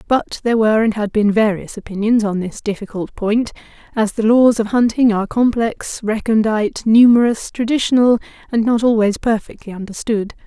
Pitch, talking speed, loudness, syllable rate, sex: 220 Hz, 155 wpm, -16 LUFS, 5.3 syllables/s, female